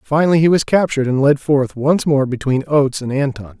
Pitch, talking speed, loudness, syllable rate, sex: 140 Hz, 215 wpm, -16 LUFS, 5.8 syllables/s, male